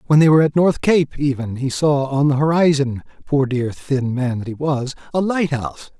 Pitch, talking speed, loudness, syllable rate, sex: 140 Hz, 210 wpm, -18 LUFS, 5.1 syllables/s, male